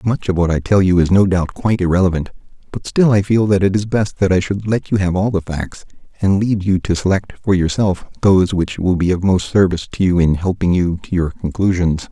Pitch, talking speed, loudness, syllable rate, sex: 95 Hz, 250 wpm, -16 LUFS, 5.7 syllables/s, male